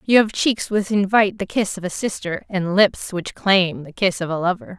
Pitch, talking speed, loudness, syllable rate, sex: 195 Hz, 240 wpm, -20 LUFS, 4.9 syllables/s, female